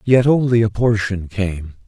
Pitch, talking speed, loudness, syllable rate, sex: 105 Hz, 160 wpm, -17 LUFS, 4.2 syllables/s, male